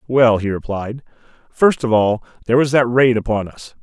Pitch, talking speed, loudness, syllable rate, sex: 120 Hz, 190 wpm, -17 LUFS, 5.2 syllables/s, male